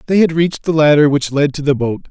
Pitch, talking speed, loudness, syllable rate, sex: 150 Hz, 285 wpm, -14 LUFS, 6.3 syllables/s, male